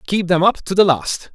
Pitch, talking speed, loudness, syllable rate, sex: 175 Hz, 265 wpm, -16 LUFS, 5.0 syllables/s, male